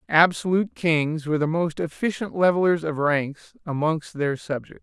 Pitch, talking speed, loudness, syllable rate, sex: 160 Hz, 150 wpm, -23 LUFS, 4.8 syllables/s, male